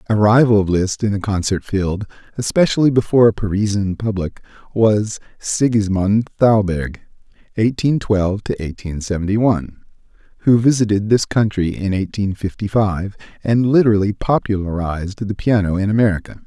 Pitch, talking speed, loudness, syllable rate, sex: 105 Hz, 135 wpm, -17 LUFS, 4.5 syllables/s, male